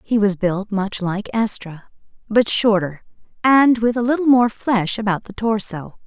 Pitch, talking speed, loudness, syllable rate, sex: 210 Hz, 170 wpm, -18 LUFS, 4.3 syllables/s, female